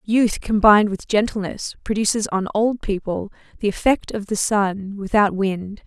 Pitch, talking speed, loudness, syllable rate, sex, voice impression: 205 Hz, 155 wpm, -20 LUFS, 4.5 syllables/s, female, very feminine, slightly young, adult-like, thin, slightly tensed, slightly powerful, bright, very clear, very fluent, slightly raspy, very cute, intellectual, very refreshing, sincere, calm, very friendly, very reassuring, unique, elegant, slightly wild, very sweet, very lively, strict, slightly intense, sharp, light